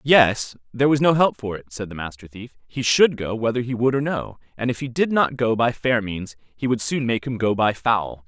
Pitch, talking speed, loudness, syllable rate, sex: 120 Hz, 260 wpm, -21 LUFS, 5.1 syllables/s, male